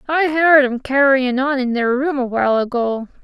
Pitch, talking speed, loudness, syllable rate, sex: 265 Hz, 205 wpm, -16 LUFS, 4.8 syllables/s, female